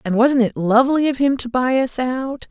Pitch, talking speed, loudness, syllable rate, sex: 255 Hz, 240 wpm, -18 LUFS, 5.0 syllables/s, female